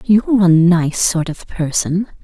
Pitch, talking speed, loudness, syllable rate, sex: 180 Hz, 160 wpm, -15 LUFS, 4.0 syllables/s, female